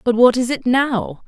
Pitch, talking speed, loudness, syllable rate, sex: 240 Hz, 235 wpm, -17 LUFS, 4.3 syllables/s, female